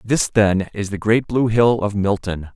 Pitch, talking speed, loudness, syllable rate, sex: 105 Hz, 210 wpm, -18 LUFS, 4.2 syllables/s, male